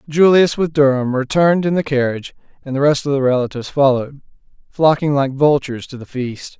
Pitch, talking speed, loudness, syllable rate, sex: 140 Hz, 180 wpm, -16 LUFS, 6.0 syllables/s, male